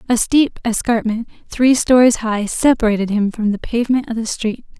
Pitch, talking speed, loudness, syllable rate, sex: 230 Hz, 175 wpm, -16 LUFS, 5.2 syllables/s, female